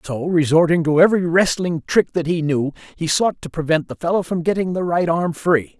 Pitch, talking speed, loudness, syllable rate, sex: 165 Hz, 215 wpm, -18 LUFS, 5.4 syllables/s, male